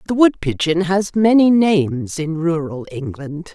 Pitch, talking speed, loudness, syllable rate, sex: 170 Hz, 135 wpm, -17 LUFS, 4.2 syllables/s, female